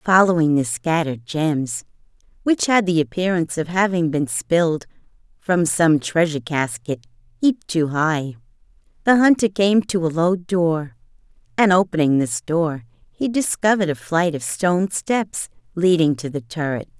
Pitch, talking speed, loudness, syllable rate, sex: 165 Hz, 140 wpm, -20 LUFS, 4.7 syllables/s, female